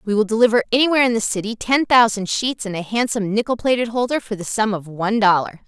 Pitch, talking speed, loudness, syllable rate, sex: 220 Hz, 230 wpm, -18 LUFS, 6.6 syllables/s, female